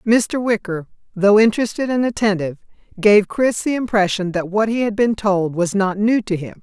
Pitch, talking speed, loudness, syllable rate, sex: 210 Hz, 190 wpm, -18 LUFS, 5.2 syllables/s, female